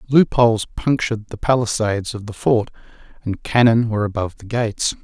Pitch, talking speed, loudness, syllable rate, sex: 110 Hz, 165 wpm, -19 LUFS, 6.0 syllables/s, male